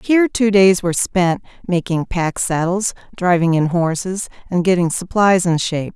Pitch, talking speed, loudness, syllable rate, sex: 180 Hz, 160 wpm, -17 LUFS, 4.8 syllables/s, female